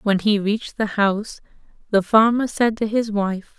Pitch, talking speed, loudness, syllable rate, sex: 210 Hz, 185 wpm, -20 LUFS, 4.7 syllables/s, female